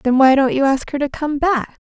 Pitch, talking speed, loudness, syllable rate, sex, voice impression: 275 Hz, 290 wpm, -17 LUFS, 5.1 syllables/s, female, feminine, middle-aged, tensed, intellectual, calm, reassuring, elegant, lively, slightly strict